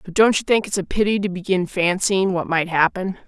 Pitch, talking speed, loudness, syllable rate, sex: 185 Hz, 240 wpm, -20 LUFS, 5.5 syllables/s, female